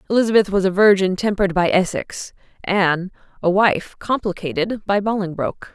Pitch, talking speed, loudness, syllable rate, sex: 190 Hz, 135 wpm, -19 LUFS, 5.5 syllables/s, female